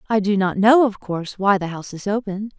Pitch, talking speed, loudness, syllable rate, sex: 205 Hz, 255 wpm, -19 LUFS, 6.0 syllables/s, female